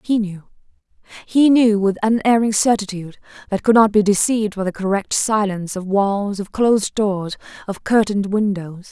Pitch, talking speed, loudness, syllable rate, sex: 205 Hz, 170 wpm, -18 LUFS, 5.2 syllables/s, female